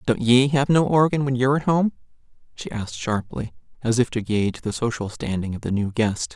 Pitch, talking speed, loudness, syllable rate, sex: 120 Hz, 215 wpm, -22 LUFS, 5.6 syllables/s, male